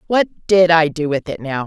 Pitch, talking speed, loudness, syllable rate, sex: 165 Hz, 255 wpm, -16 LUFS, 5.3 syllables/s, female